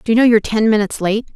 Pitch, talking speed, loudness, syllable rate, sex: 220 Hz, 310 wpm, -15 LUFS, 8.3 syllables/s, female